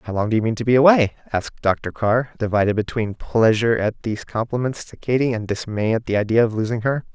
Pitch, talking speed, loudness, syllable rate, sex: 115 Hz, 225 wpm, -20 LUFS, 6.0 syllables/s, male